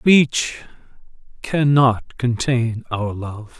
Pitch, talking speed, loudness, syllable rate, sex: 125 Hz, 100 wpm, -19 LUFS, 2.6 syllables/s, male